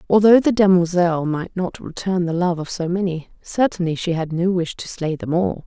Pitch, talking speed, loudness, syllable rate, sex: 175 Hz, 210 wpm, -19 LUFS, 5.2 syllables/s, female